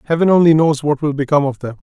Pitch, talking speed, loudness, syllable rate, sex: 150 Hz, 260 wpm, -14 LUFS, 7.4 syllables/s, male